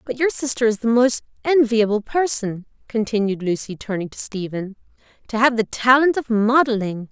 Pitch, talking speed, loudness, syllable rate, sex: 230 Hz, 160 wpm, -20 LUFS, 5.1 syllables/s, female